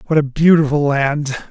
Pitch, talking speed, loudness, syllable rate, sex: 145 Hz, 160 wpm, -15 LUFS, 5.0 syllables/s, male